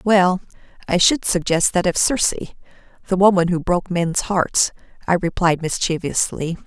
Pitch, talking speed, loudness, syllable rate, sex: 180 Hz, 135 wpm, -19 LUFS, 4.9 syllables/s, female